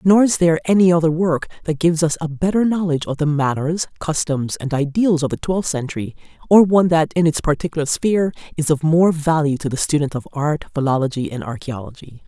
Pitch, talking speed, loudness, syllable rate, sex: 160 Hz, 200 wpm, -18 LUFS, 6.0 syllables/s, female